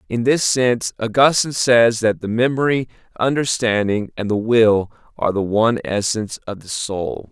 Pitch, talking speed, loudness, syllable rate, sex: 115 Hz, 155 wpm, -18 LUFS, 5.0 syllables/s, male